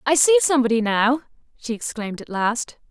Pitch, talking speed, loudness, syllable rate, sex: 250 Hz, 165 wpm, -20 LUFS, 5.8 syllables/s, female